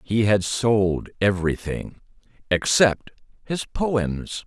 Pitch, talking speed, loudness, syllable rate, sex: 105 Hz, 80 wpm, -22 LUFS, 3.2 syllables/s, male